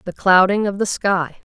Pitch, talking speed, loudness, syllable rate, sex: 190 Hz, 200 wpm, -17 LUFS, 4.7 syllables/s, female